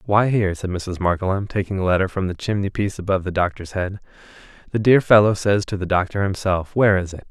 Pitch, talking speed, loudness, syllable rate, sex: 95 Hz, 215 wpm, -20 LUFS, 6.4 syllables/s, male